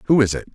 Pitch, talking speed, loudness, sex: 115 Hz, 330 wpm, -19 LUFS, male